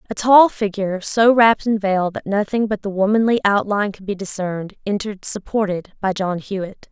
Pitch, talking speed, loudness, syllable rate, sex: 200 Hz, 180 wpm, -18 LUFS, 5.7 syllables/s, female